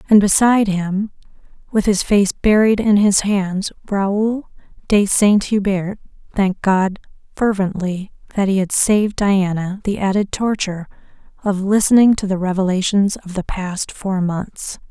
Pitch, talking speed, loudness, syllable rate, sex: 200 Hz, 140 wpm, -17 LUFS, 4.4 syllables/s, female